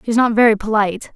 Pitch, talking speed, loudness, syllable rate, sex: 220 Hz, 260 wpm, -15 LUFS, 7.8 syllables/s, female